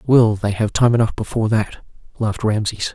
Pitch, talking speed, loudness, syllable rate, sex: 110 Hz, 185 wpm, -19 LUFS, 6.0 syllables/s, male